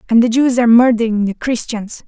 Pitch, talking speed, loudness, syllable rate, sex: 230 Hz, 205 wpm, -14 LUFS, 5.8 syllables/s, female